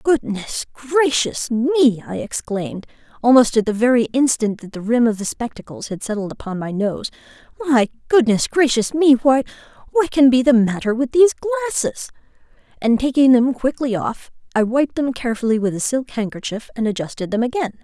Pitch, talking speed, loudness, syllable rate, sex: 240 Hz, 165 wpm, -18 LUFS, 5.4 syllables/s, female